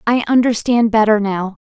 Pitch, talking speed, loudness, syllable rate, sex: 220 Hz, 140 wpm, -15 LUFS, 4.9 syllables/s, female